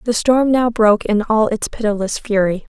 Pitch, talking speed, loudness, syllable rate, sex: 220 Hz, 195 wpm, -16 LUFS, 5.1 syllables/s, female